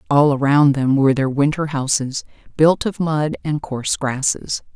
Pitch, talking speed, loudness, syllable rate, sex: 140 Hz, 165 wpm, -18 LUFS, 4.7 syllables/s, female